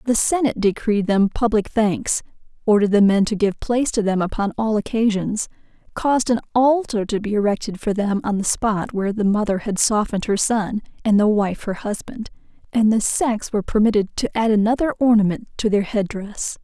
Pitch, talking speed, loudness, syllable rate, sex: 215 Hz, 190 wpm, -20 LUFS, 5.5 syllables/s, female